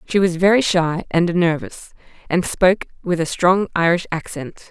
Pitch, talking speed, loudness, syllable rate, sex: 175 Hz, 165 wpm, -18 LUFS, 4.6 syllables/s, female